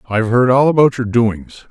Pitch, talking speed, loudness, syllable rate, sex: 120 Hz, 210 wpm, -14 LUFS, 5.4 syllables/s, male